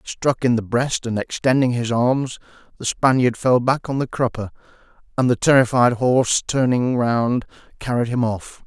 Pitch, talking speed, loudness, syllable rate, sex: 125 Hz, 165 wpm, -19 LUFS, 4.8 syllables/s, male